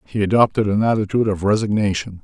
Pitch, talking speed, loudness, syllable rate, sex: 105 Hz, 160 wpm, -18 LUFS, 6.8 syllables/s, male